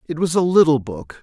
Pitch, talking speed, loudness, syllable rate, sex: 155 Hz, 245 wpm, -17 LUFS, 5.3 syllables/s, male